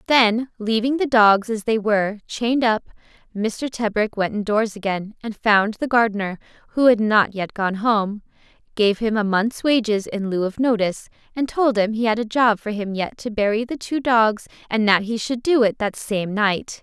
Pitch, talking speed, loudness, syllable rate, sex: 220 Hz, 200 wpm, -20 LUFS, 4.8 syllables/s, female